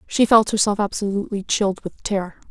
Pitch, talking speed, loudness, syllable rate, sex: 205 Hz, 170 wpm, -20 LUFS, 6.2 syllables/s, female